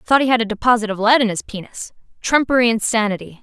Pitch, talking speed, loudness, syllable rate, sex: 225 Hz, 210 wpm, -17 LUFS, 6.5 syllables/s, female